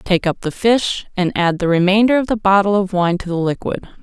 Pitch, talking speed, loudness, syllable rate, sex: 195 Hz, 240 wpm, -16 LUFS, 5.4 syllables/s, female